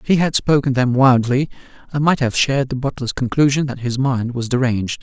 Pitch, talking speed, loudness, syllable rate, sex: 130 Hz, 215 wpm, -18 LUFS, 5.7 syllables/s, male